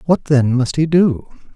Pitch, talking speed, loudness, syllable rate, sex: 145 Hz, 195 wpm, -15 LUFS, 4.2 syllables/s, male